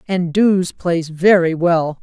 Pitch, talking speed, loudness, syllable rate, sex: 175 Hz, 150 wpm, -16 LUFS, 3.2 syllables/s, female